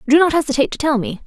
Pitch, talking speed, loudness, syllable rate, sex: 280 Hz, 285 wpm, -17 LUFS, 8.4 syllables/s, female